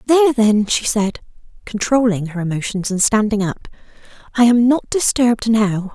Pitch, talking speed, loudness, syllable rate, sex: 220 Hz, 150 wpm, -16 LUFS, 4.9 syllables/s, female